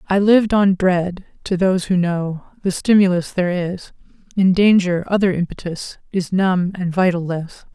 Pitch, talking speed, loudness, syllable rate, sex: 185 Hz, 165 wpm, -18 LUFS, 4.7 syllables/s, female